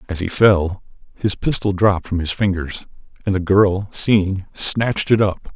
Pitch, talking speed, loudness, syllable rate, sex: 100 Hz, 175 wpm, -18 LUFS, 4.4 syllables/s, male